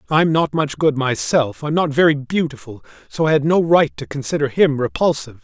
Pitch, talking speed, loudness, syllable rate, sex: 145 Hz, 200 wpm, -18 LUFS, 5.4 syllables/s, male